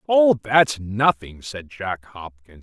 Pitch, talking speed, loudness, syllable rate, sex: 115 Hz, 135 wpm, -20 LUFS, 3.3 syllables/s, male